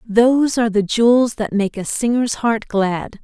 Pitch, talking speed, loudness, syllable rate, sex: 225 Hz, 185 wpm, -17 LUFS, 4.5 syllables/s, female